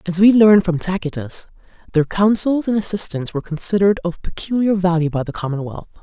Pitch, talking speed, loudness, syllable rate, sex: 185 Hz, 170 wpm, -17 LUFS, 6.1 syllables/s, female